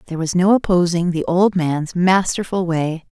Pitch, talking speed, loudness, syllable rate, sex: 175 Hz, 170 wpm, -18 LUFS, 4.8 syllables/s, female